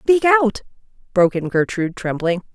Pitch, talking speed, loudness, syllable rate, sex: 215 Hz, 140 wpm, -18 LUFS, 5.3 syllables/s, female